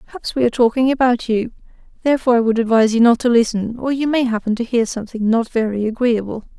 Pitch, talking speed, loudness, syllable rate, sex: 235 Hz, 220 wpm, -17 LUFS, 6.9 syllables/s, female